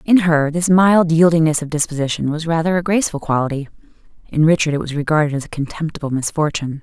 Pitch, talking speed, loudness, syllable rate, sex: 155 Hz, 185 wpm, -17 LUFS, 6.5 syllables/s, female